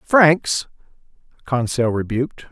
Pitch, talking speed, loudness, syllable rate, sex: 140 Hz, 70 wpm, -19 LUFS, 3.6 syllables/s, male